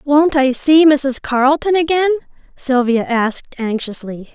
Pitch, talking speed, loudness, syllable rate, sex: 275 Hz, 125 wpm, -15 LUFS, 4.3 syllables/s, female